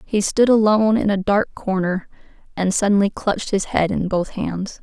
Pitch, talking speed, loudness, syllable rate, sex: 200 Hz, 185 wpm, -19 LUFS, 4.9 syllables/s, female